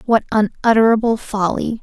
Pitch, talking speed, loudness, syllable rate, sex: 220 Hz, 100 wpm, -16 LUFS, 5.0 syllables/s, female